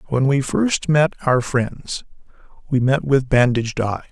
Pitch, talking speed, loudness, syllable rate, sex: 130 Hz, 160 wpm, -19 LUFS, 4.2 syllables/s, male